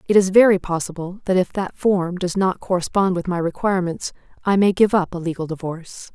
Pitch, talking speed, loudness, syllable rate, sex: 185 Hz, 205 wpm, -20 LUFS, 5.7 syllables/s, female